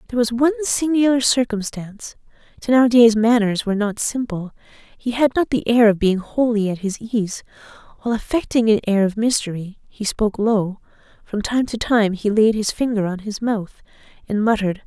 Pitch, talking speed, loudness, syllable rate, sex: 225 Hz, 180 wpm, -19 LUFS, 5.5 syllables/s, female